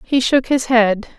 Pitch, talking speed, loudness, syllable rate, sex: 240 Hz, 200 wpm, -16 LUFS, 3.9 syllables/s, female